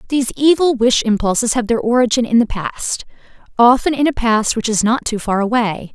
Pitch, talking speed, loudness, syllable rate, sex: 235 Hz, 200 wpm, -16 LUFS, 5.4 syllables/s, female